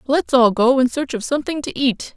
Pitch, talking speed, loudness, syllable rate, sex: 260 Hz, 250 wpm, -18 LUFS, 5.5 syllables/s, female